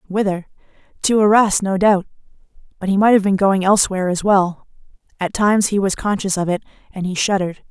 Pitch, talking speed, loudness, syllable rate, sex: 195 Hz, 185 wpm, -17 LUFS, 6.1 syllables/s, female